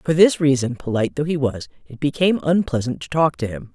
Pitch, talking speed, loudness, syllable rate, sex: 140 Hz, 225 wpm, -20 LUFS, 6.0 syllables/s, female